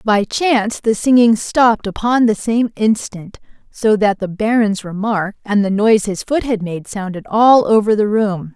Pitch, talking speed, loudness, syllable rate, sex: 215 Hz, 180 wpm, -15 LUFS, 4.5 syllables/s, female